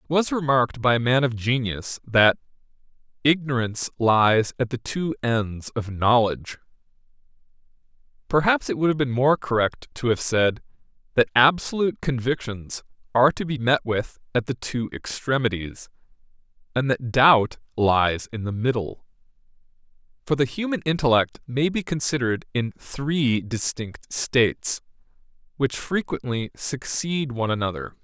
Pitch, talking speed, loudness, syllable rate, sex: 125 Hz, 135 wpm, -23 LUFS, 4.6 syllables/s, male